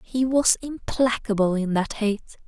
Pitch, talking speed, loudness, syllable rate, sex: 225 Hz, 145 wpm, -23 LUFS, 4.3 syllables/s, female